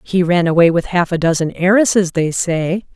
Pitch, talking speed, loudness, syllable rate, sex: 175 Hz, 205 wpm, -15 LUFS, 5.1 syllables/s, female